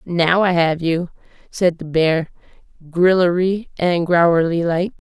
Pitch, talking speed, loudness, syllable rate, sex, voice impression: 175 Hz, 130 wpm, -17 LUFS, 3.9 syllables/s, female, feminine, adult-like, slightly halting, unique